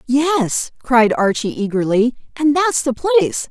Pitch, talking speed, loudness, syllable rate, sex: 260 Hz, 135 wpm, -17 LUFS, 4.0 syllables/s, female